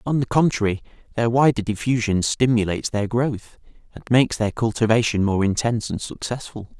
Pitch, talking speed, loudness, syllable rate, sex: 115 Hz, 150 wpm, -21 LUFS, 5.6 syllables/s, male